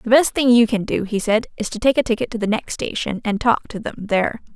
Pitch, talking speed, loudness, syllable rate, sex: 225 Hz, 290 wpm, -19 LUFS, 5.9 syllables/s, female